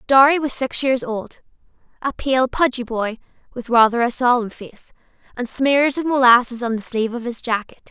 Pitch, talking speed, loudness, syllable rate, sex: 245 Hz, 180 wpm, -18 LUFS, 5.1 syllables/s, female